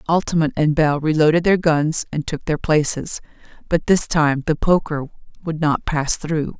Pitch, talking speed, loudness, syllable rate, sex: 155 Hz, 175 wpm, -19 LUFS, 4.6 syllables/s, female